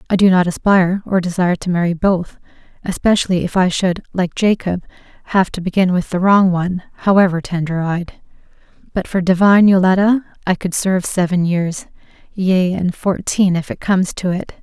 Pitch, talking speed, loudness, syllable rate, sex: 185 Hz, 170 wpm, -16 LUFS, 5.5 syllables/s, female